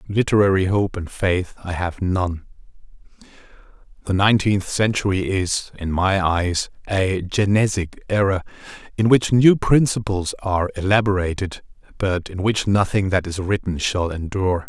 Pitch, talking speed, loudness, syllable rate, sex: 95 Hz, 130 wpm, -20 LUFS, 4.6 syllables/s, male